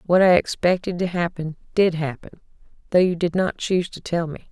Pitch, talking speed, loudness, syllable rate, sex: 175 Hz, 200 wpm, -21 LUFS, 5.5 syllables/s, female